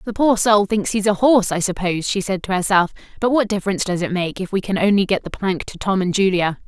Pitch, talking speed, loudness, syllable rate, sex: 195 Hz, 270 wpm, -19 LUFS, 6.2 syllables/s, female